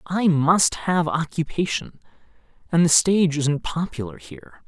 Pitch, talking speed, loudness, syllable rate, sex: 150 Hz, 130 wpm, -21 LUFS, 4.5 syllables/s, male